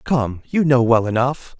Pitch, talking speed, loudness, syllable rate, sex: 125 Hz, 190 wpm, -18 LUFS, 4.1 syllables/s, male